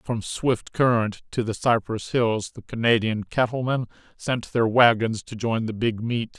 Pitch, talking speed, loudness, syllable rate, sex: 115 Hz, 170 wpm, -23 LUFS, 4.2 syllables/s, male